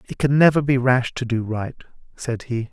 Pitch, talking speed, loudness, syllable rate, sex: 125 Hz, 220 wpm, -20 LUFS, 5.2 syllables/s, male